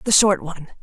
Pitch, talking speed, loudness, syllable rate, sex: 190 Hz, 220 wpm, -18 LUFS, 6.8 syllables/s, female